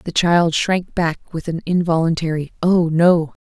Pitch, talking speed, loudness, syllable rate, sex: 170 Hz, 155 wpm, -18 LUFS, 4.2 syllables/s, female